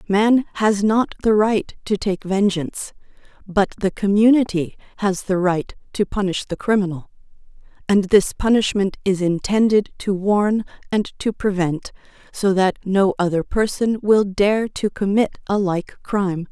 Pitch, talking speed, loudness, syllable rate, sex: 200 Hz, 145 wpm, -19 LUFS, 4.3 syllables/s, female